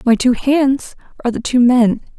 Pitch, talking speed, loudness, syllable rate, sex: 250 Hz, 190 wpm, -15 LUFS, 4.9 syllables/s, female